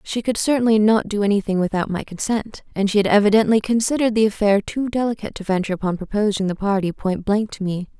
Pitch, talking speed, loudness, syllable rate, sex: 210 Hz, 210 wpm, -20 LUFS, 6.5 syllables/s, female